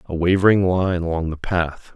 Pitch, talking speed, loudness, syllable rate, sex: 90 Hz, 185 wpm, -20 LUFS, 4.9 syllables/s, male